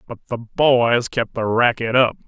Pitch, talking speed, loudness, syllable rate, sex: 120 Hz, 185 wpm, -18 LUFS, 4.2 syllables/s, male